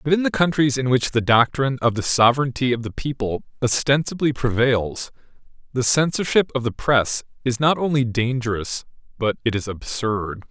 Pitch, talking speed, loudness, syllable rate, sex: 125 Hz, 165 wpm, -21 LUFS, 5.2 syllables/s, male